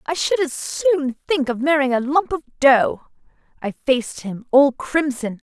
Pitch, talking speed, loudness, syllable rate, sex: 285 Hz, 175 wpm, -19 LUFS, 4.3 syllables/s, female